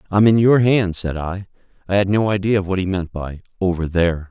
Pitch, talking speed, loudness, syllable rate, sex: 95 Hz, 235 wpm, -18 LUFS, 5.8 syllables/s, male